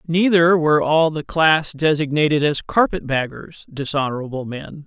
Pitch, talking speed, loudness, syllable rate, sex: 155 Hz, 125 wpm, -18 LUFS, 4.7 syllables/s, male